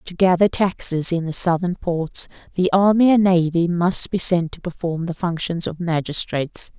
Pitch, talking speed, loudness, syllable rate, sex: 175 Hz, 175 wpm, -19 LUFS, 4.7 syllables/s, female